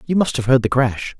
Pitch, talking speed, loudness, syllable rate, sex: 130 Hz, 305 wpm, -18 LUFS, 5.5 syllables/s, male